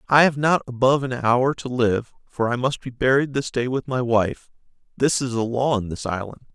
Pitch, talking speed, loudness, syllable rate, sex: 125 Hz, 230 wpm, -22 LUFS, 5.2 syllables/s, male